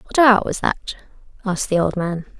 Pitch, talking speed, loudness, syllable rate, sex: 200 Hz, 200 wpm, -19 LUFS, 5.1 syllables/s, female